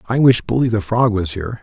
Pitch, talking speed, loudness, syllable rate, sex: 110 Hz, 260 wpm, -17 LUFS, 5.9 syllables/s, male